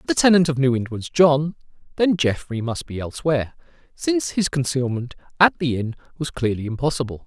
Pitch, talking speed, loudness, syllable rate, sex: 140 Hz, 180 wpm, -21 LUFS, 5.7 syllables/s, male